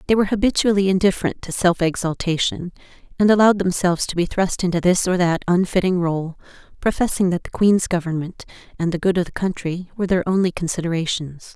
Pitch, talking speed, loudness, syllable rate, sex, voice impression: 180 Hz, 175 wpm, -20 LUFS, 6.2 syllables/s, female, feminine, adult-like, tensed, fluent, intellectual, calm, slightly reassuring, elegant, slightly strict, slightly sharp